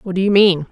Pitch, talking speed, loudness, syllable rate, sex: 185 Hz, 335 wpm, -14 LUFS, 6.0 syllables/s, female